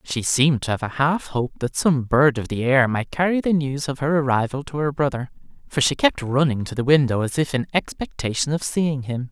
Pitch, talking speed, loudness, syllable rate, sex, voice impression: 140 Hz, 240 wpm, -21 LUFS, 5.3 syllables/s, male, masculine, adult-like, tensed, powerful, bright, clear, fluent, cool, intellectual, friendly, wild, lively, slightly kind